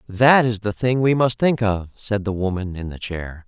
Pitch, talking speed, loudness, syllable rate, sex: 105 Hz, 240 wpm, -20 LUFS, 4.7 syllables/s, male